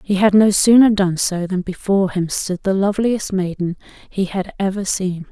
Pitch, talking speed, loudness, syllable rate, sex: 190 Hz, 190 wpm, -17 LUFS, 4.9 syllables/s, female